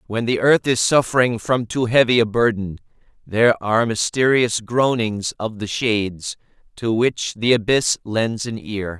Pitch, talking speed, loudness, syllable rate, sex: 115 Hz, 160 wpm, -19 LUFS, 4.5 syllables/s, male